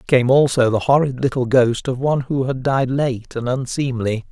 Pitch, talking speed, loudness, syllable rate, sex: 130 Hz, 195 wpm, -18 LUFS, 4.8 syllables/s, male